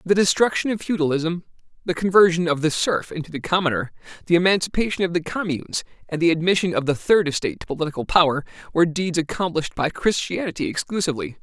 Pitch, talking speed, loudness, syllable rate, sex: 170 Hz, 175 wpm, -21 LUFS, 6.7 syllables/s, male